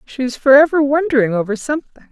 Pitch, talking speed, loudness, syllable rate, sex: 265 Hz, 170 wpm, -15 LUFS, 6.5 syllables/s, female